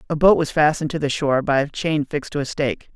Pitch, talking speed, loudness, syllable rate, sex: 150 Hz, 285 wpm, -20 LUFS, 6.9 syllables/s, male